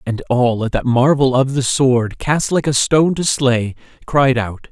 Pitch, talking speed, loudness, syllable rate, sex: 130 Hz, 205 wpm, -16 LUFS, 4.3 syllables/s, male